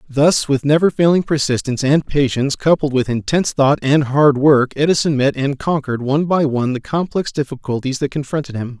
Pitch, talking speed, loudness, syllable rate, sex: 140 Hz, 185 wpm, -16 LUFS, 5.7 syllables/s, male